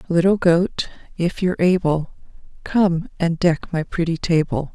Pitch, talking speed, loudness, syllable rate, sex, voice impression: 170 Hz, 140 wpm, -20 LUFS, 4.3 syllables/s, female, feminine, adult-like, tensed, slightly weak, slightly soft, halting, calm, slightly reassuring, elegant, slightly sharp, modest